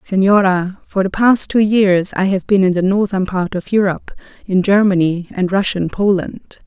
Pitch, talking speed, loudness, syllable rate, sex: 190 Hz, 180 wpm, -15 LUFS, 4.8 syllables/s, female